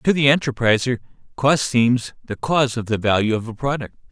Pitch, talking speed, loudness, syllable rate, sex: 125 Hz, 190 wpm, -19 LUFS, 5.6 syllables/s, male